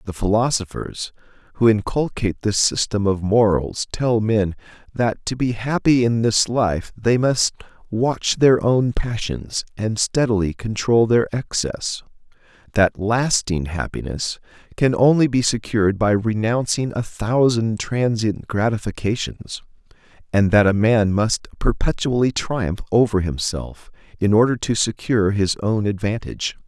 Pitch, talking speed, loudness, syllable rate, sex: 110 Hz, 130 wpm, -20 LUFS, 4.2 syllables/s, male